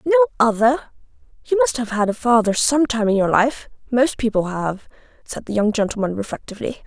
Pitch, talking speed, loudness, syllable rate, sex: 240 Hz, 185 wpm, -19 LUFS, 5.6 syllables/s, female